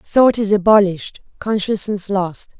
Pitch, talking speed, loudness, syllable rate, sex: 205 Hz, 115 wpm, -16 LUFS, 4.4 syllables/s, female